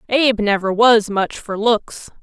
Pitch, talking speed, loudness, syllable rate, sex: 220 Hz, 160 wpm, -16 LUFS, 4.1 syllables/s, female